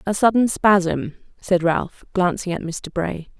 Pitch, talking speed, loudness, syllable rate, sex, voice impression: 185 Hz, 160 wpm, -20 LUFS, 3.8 syllables/s, female, feminine, slightly adult-like, tensed, clear, fluent, refreshing, slightly elegant, slightly lively